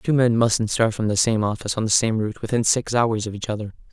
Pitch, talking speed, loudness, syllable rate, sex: 110 Hz, 275 wpm, -21 LUFS, 6.2 syllables/s, male